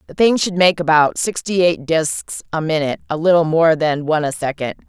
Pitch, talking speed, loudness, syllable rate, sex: 160 Hz, 195 wpm, -17 LUFS, 5.4 syllables/s, female